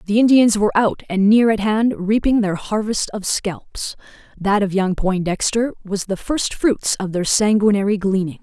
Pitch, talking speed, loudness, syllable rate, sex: 205 Hz, 170 wpm, -18 LUFS, 4.6 syllables/s, female